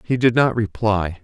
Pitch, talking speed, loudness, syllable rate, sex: 110 Hz, 195 wpm, -19 LUFS, 4.4 syllables/s, male